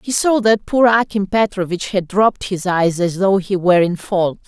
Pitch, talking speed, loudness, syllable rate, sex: 195 Hz, 215 wpm, -16 LUFS, 4.9 syllables/s, female